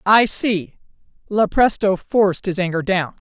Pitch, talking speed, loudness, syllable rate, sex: 195 Hz, 130 wpm, -18 LUFS, 4.3 syllables/s, female